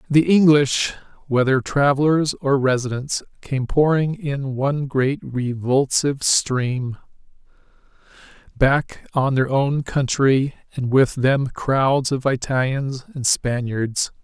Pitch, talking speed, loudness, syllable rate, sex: 135 Hz, 110 wpm, -20 LUFS, 3.6 syllables/s, male